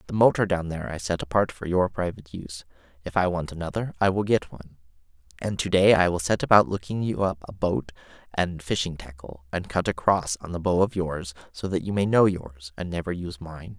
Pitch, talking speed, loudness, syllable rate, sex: 90 Hz, 230 wpm, -25 LUFS, 5.7 syllables/s, male